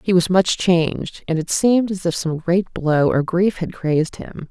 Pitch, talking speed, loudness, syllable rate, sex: 175 Hz, 225 wpm, -19 LUFS, 4.6 syllables/s, female